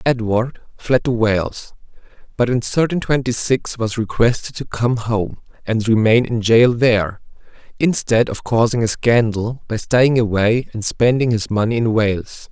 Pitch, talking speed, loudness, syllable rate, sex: 115 Hz, 160 wpm, -17 LUFS, 4.3 syllables/s, male